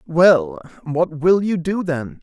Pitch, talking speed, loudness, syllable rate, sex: 165 Hz, 160 wpm, -18 LUFS, 3.3 syllables/s, male